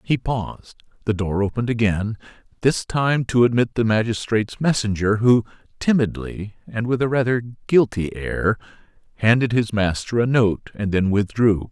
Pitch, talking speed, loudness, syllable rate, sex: 110 Hz, 150 wpm, -21 LUFS, 4.7 syllables/s, male